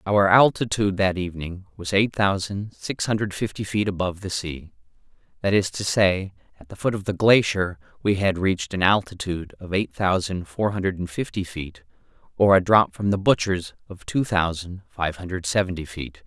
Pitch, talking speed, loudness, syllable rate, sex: 95 Hz, 180 wpm, -23 LUFS, 5.1 syllables/s, male